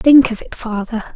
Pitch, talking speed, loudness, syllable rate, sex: 235 Hz, 210 wpm, -17 LUFS, 4.9 syllables/s, female